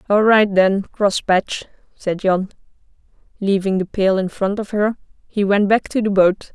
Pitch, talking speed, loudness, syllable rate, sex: 200 Hz, 175 wpm, -18 LUFS, 4.4 syllables/s, female